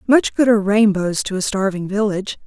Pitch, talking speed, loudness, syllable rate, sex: 205 Hz, 195 wpm, -17 LUFS, 5.8 syllables/s, female